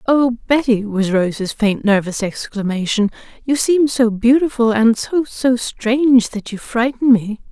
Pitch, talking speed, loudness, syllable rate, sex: 235 Hz, 130 wpm, -16 LUFS, 4.2 syllables/s, female